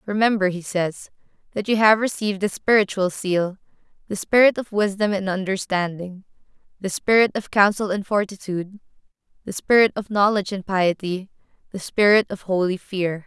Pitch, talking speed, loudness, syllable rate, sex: 195 Hz, 150 wpm, -21 LUFS, 5.3 syllables/s, female